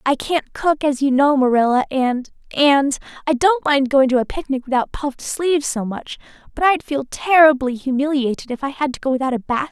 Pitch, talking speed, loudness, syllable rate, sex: 275 Hz, 200 wpm, -18 LUFS, 5.5 syllables/s, female